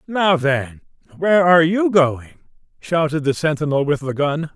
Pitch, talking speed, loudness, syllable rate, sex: 155 Hz, 160 wpm, -17 LUFS, 4.8 syllables/s, male